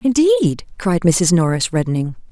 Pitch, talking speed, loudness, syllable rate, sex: 185 Hz, 130 wpm, -16 LUFS, 5.6 syllables/s, female